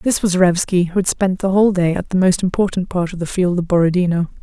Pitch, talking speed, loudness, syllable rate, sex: 185 Hz, 260 wpm, -17 LUFS, 6.1 syllables/s, female